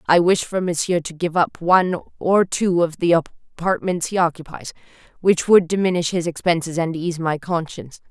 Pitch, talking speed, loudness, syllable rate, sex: 170 Hz, 180 wpm, -19 LUFS, 5.2 syllables/s, female